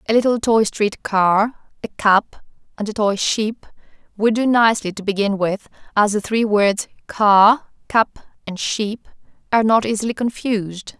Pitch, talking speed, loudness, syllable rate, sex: 215 Hz, 160 wpm, -18 LUFS, 4.4 syllables/s, female